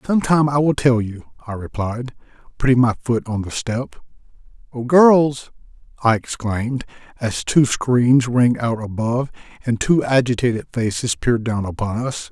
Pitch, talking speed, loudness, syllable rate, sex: 120 Hz, 155 wpm, -19 LUFS, 4.6 syllables/s, male